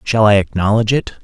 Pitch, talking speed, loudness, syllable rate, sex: 110 Hz, 195 wpm, -14 LUFS, 6.3 syllables/s, male